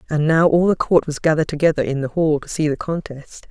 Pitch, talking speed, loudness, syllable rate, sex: 155 Hz, 255 wpm, -18 LUFS, 6.0 syllables/s, female